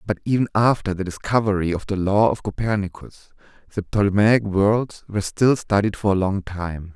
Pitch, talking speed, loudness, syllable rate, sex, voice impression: 100 Hz, 175 wpm, -21 LUFS, 5.2 syllables/s, male, masculine, adult-like, slightly soft, cool, sincere, calm